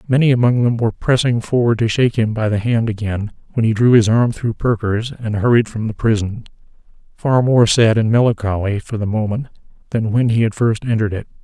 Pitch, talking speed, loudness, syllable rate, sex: 115 Hz, 210 wpm, -17 LUFS, 5.7 syllables/s, male